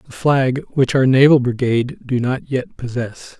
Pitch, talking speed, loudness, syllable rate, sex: 130 Hz, 175 wpm, -17 LUFS, 4.6 syllables/s, male